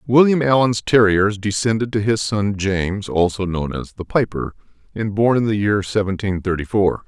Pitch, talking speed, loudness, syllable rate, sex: 105 Hz, 180 wpm, -19 LUFS, 4.9 syllables/s, male